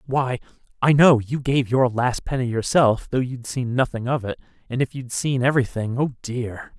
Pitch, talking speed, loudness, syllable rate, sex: 125 Hz, 195 wpm, -22 LUFS, 4.9 syllables/s, male